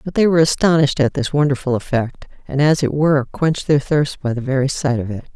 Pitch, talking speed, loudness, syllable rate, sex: 140 Hz, 235 wpm, -17 LUFS, 6.3 syllables/s, female